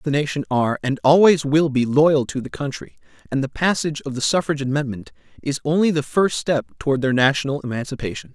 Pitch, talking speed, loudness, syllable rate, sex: 145 Hz, 195 wpm, -20 LUFS, 6.1 syllables/s, male